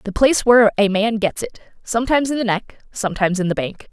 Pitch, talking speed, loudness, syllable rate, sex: 215 Hz, 215 wpm, -18 LUFS, 6.9 syllables/s, female